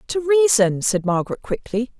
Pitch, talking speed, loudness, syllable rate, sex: 245 Hz, 150 wpm, -19 LUFS, 5.0 syllables/s, female